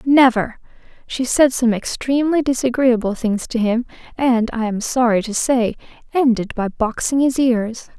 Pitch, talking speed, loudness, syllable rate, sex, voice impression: 240 Hz, 150 wpm, -18 LUFS, 4.5 syllables/s, female, very feminine, very young, very thin, slightly tensed, slightly powerful, very bright, soft, very clear, very fluent, slightly raspy, very cute, intellectual, very refreshing, sincere, slightly calm, very friendly, very reassuring, very unique, elegant, slightly wild, very sweet, very lively, kind, slightly intense, slightly sharp, light